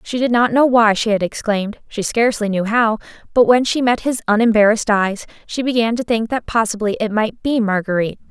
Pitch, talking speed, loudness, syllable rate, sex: 225 Hz, 200 wpm, -17 LUFS, 5.8 syllables/s, female